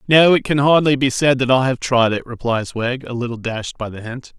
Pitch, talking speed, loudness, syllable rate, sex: 125 Hz, 260 wpm, -17 LUFS, 5.2 syllables/s, male